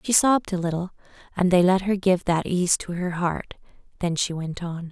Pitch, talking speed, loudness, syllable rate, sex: 180 Hz, 220 wpm, -23 LUFS, 5.1 syllables/s, female